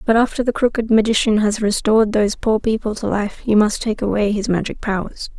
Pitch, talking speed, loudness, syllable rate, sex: 215 Hz, 210 wpm, -18 LUFS, 5.8 syllables/s, female